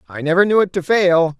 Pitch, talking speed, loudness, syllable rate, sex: 175 Hz, 260 wpm, -15 LUFS, 5.8 syllables/s, male